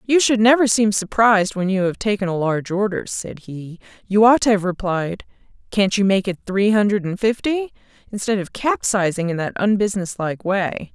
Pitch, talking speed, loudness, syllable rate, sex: 200 Hz, 185 wpm, -19 LUFS, 5.3 syllables/s, female